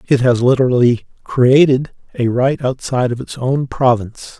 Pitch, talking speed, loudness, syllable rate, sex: 125 Hz, 150 wpm, -15 LUFS, 4.9 syllables/s, male